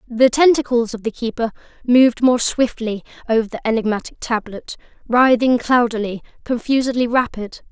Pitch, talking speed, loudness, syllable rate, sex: 235 Hz, 125 wpm, -18 LUFS, 5.2 syllables/s, female